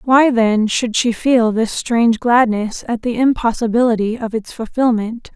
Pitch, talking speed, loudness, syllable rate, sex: 230 Hz, 155 wpm, -16 LUFS, 4.4 syllables/s, female